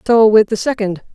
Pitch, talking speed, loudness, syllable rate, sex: 215 Hz, 210 wpm, -14 LUFS, 5.3 syllables/s, female